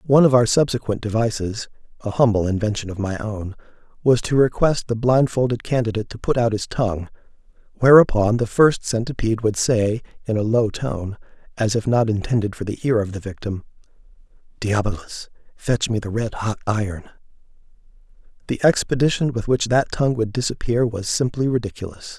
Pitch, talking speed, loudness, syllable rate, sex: 115 Hz, 155 wpm, -20 LUFS, 5.6 syllables/s, male